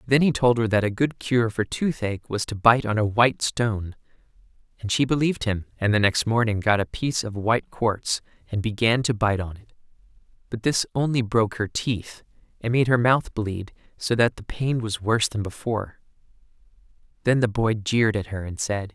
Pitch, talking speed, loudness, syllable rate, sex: 110 Hz, 205 wpm, -23 LUFS, 5.3 syllables/s, male